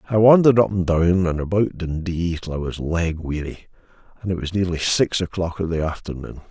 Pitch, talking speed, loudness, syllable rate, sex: 90 Hz, 205 wpm, -21 LUFS, 5.5 syllables/s, male